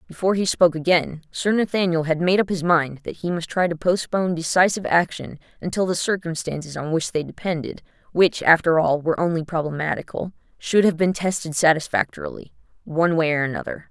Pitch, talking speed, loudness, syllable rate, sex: 170 Hz, 170 wpm, -21 LUFS, 6.0 syllables/s, female